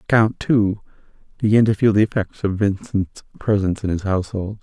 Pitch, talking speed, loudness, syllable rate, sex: 100 Hz, 180 wpm, -20 LUFS, 5.6 syllables/s, male